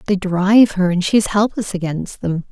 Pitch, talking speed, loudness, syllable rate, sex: 190 Hz, 215 wpm, -16 LUFS, 5.2 syllables/s, female